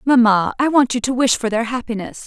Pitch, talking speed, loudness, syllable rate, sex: 240 Hz, 240 wpm, -17 LUFS, 5.7 syllables/s, female